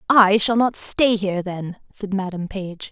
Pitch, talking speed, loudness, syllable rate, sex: 200 Hz, 185 wpm, -20 LUFS, 4.2 syllables/s, female